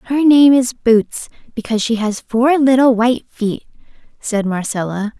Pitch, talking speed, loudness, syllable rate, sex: 235 Hz, 150 wpm, -15 LUFS, 4.4 syllables/s, female